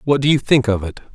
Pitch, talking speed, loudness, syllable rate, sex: 125 Hz, 315 wpm, -16 LUFS, 6.4 syllables/s, male